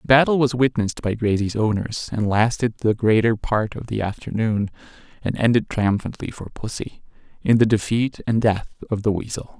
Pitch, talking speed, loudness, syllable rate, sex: 110 Hz, 175 wpm, -21 LUFS, 5.1 syllables/s, male